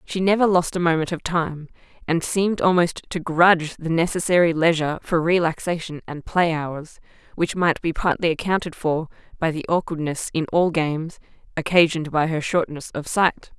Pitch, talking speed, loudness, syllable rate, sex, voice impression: 165 Hz, 170 wpm, -21 LUFS, 5.2 syllables/s, female, gender-neutral, slightly adult-like, tensed, clear, intellectual, calm